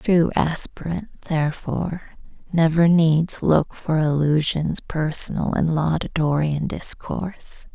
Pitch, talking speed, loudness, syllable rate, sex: 160 Hz, 110 wpm, -21 LUFS, 4.1 syllables/s, female